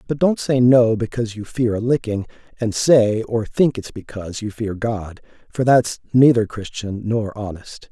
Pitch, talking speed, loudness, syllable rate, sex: 115 Hz, 180 wpm, -19 LUFS, 4.6 syllables/s, male